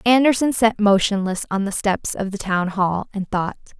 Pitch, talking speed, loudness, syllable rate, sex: 205 Hz, 190 wpm, -20 LUFS, 4.8 syllables/s, female